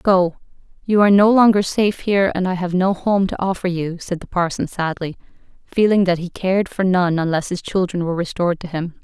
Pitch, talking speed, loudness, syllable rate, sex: 185 Hz, 210 wpm, -18 LUFS, 5.7 syllables/s, female